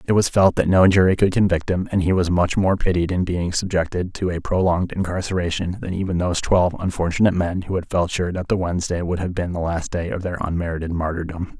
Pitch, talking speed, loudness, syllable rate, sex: 90 Hz, 235 wpm, -21 LUFS, 6.2 syllables/s, male